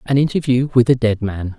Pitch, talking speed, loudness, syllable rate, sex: 120 Hz, 225 wpm, -17 LUFS, 5.6 syllables/s, male